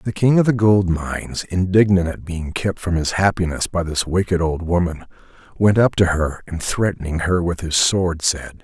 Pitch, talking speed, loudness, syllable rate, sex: 90 Hz, 200 wpm, -19 LUFS, 4.7 syllables/s, male